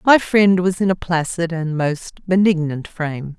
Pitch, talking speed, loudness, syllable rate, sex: 175 Hz, 175 wpm, -18 LUFS, 4.3 syllables/s, female